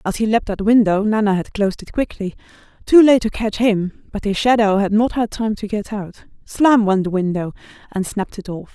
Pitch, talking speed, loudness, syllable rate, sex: 210 Hz, 235 wpm, -18 LUFS, 5.4 syllables/s, female